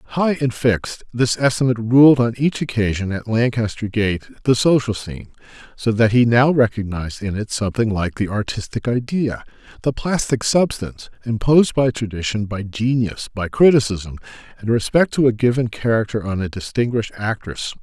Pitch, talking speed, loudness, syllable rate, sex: 115 Hz, 160 wpm, -19 LUFS, 5.3 syllables/s, male